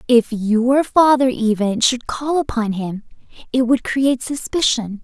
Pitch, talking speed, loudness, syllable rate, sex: 245 Hz, 145 wpm, -18 LUFS, 4.2 syllables/s, female